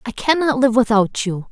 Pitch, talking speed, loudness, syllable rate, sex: 240 Hz, 200 wpm, -17 LUFS, 5.0 syllables/s, female